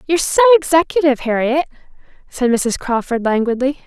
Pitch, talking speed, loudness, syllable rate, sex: 275 Hz, 125 wpm, -16 LUFS, 6.0 syllables/s, female